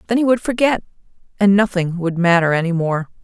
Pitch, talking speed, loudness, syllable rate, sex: 190 Hz, 185 wpm, -17 LUFS, 5.9 syllables/s, female